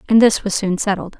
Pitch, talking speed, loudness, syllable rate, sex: 200 Hz, 250 wpm, -17 LUFS, 5.8 syllables/s, female